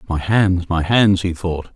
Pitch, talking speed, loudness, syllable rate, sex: 90 Hz, 205 wpm, -17 LUFS, 3.8 syllables/s, male